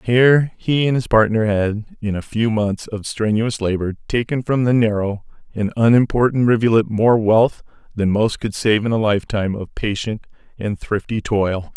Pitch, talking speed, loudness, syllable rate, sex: 110 Hz, 175 wpm, -18 LUFS, 4.8 syllables/s, male